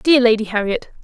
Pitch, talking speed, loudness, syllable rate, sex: 240 Hz, 175 wpm, -17 LUFS, 5.6 syllables/s, female